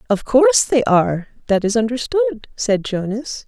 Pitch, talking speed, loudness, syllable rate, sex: 240 Hz, 155 wpm, -17 LUFS, 4.6 syllables/s, female